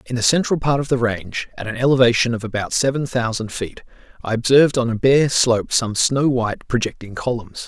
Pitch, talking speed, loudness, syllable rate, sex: 120 Hz, 205 wpm, -19 LUFS, 5.8 syllables/s, male